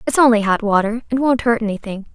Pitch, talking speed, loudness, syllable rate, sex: 225 Hz, 225 wpm, -17 LUFS, 6.4 syllables/s, female